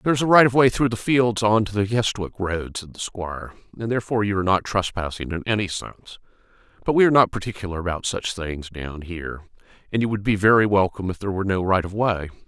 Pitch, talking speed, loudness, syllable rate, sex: 100 Hz, 235 wpm, -22 LUFS, 6.8 syllables/s, male